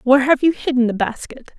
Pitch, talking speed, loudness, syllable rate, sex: 260 Hz, 225 wpm, -17 LUFS, 5.8 syllables/s, female